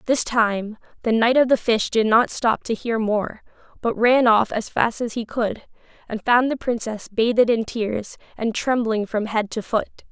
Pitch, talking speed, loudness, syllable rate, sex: 225 Hz, 200 wpm, -21 LUFS, 4.3 syllables/s, female